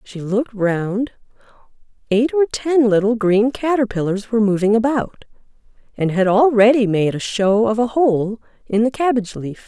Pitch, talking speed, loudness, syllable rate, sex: 220 Hz, 150 wpm, -17 LUFS, 4.8 syllables/s, female